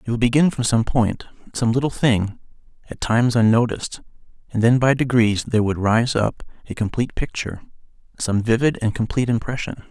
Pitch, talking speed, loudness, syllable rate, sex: 115 Hz, 170 wpm, -20 LUFS, 5.9 syllables/s, male